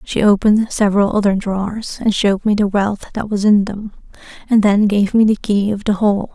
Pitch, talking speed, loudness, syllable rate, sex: 205 Hz, 215 wpm, -16 LUFS, 5.6 syllables/s, female